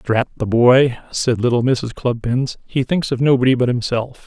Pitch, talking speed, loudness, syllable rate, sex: 125 Hz, 185 wpm, -17 LUFS, 4.7 syllables/s, male